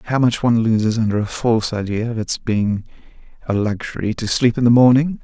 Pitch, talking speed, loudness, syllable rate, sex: 115 Hz, 205 wpm, -18 LUFS, 5.9 syllables/s, male